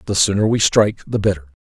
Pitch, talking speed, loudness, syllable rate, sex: 100 Hz, 220 wpm, -17 LUFS, 6.7 syllables/s, male